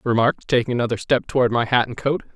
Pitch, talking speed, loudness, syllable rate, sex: 120 Hz, 255 wpm, -20 LUFS, 7.6 syllables/s, male